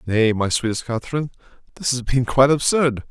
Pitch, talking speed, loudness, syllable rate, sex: 125 Hz, 175 wpm, -20 LUFS, 6.0 syllables/s, male